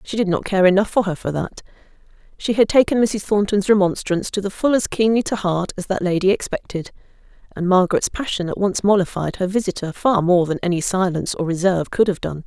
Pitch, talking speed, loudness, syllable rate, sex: 190 Hz, 210 wpm, -19 LUFS, 6.1 syllables/s, female